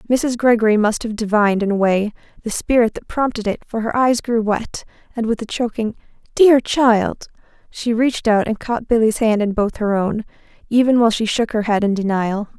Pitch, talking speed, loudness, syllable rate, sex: 220 Hz, 200 wpm, -18 LUFS, 5.3 syllables/s, female